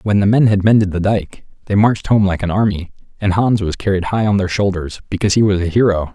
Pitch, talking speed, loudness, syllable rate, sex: 100 Hz, 255 wpm, -15 LUFS, 6.2 syllables/s, male